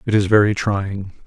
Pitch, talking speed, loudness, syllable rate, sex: 100 Hz, 190 wpm, -18 LUFS, 4.8 syllables/s, male